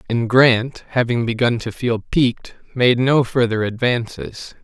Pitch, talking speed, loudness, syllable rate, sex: 120 Hz, 140 wpm, -18 LUFS, 4.2 syllables/s, male